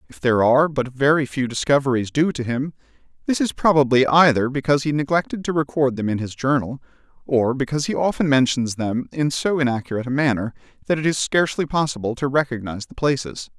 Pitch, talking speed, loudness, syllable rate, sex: 135 Hz, 190 wpm, -20 LUFS, 6.3 syllables/s, male